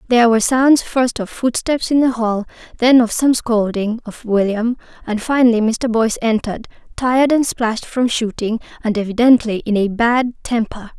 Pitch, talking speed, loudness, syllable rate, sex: 230 Hz, 170 wpm, -16 LUFS, 5.1 syllables/s, female